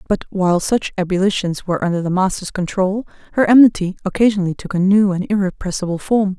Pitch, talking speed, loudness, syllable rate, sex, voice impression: 195 Hz, 170 wpm, -17 LUFS, 6.3 syllables/s, female, feminine, adult-like, clear, fluent, slightly raspy, intellectual, elegant, strict, sharp